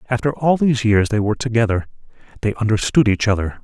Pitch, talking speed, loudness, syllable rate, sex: 115 Hz, 180 wpm, -18 LUFS, 6.6 syllables/s, male